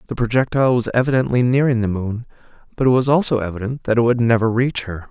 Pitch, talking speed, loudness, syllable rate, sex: 120 Hz, 210 wpm, -18 LUFS, 6.6 syllables/s, male